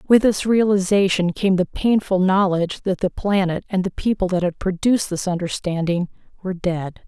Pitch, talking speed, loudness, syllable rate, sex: 190 Hz, 170 wpm, -20 LUFS, 5.4 syllables/s, female